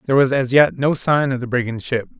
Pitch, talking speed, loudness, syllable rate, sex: 130 Hz, 275 wpm, -18 LUFS, 6.2 syllables/s, male